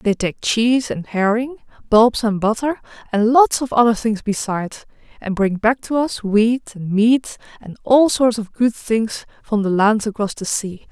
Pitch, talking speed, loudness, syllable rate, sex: 225 Hz, 185 wpm, -18 LUFS, 4.3 syllables/s, female